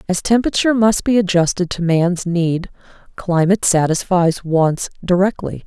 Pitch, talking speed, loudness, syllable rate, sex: 180 Hz, 125 wpm, -16 LUFS, 4.9 syllables/s, female